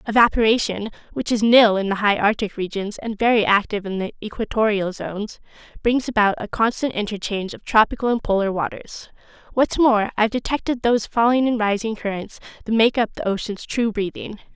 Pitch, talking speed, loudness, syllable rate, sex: 215 Hz, 170 wpm, -20 LUFS, 5.7 syllables/s, female